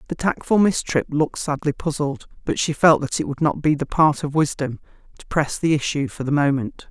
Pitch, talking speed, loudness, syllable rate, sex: 150 Hz, 225 wpm, -21 LUFS, 5.4 syllables/s, female